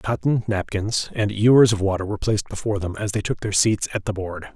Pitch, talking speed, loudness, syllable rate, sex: 105 Hz, 235 wpm, -21 LUFS, 6.0 syllables/s, male